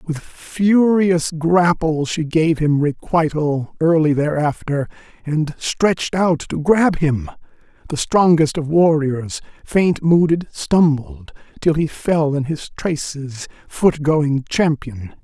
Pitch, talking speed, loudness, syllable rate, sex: 155 Hz, 120 wpm, -18 LUFS, 3.4 syllables/s, male